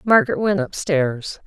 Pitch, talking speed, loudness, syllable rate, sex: 170 Hz, 125 wpm, -20 LUFS, 4.5 syllables/s, female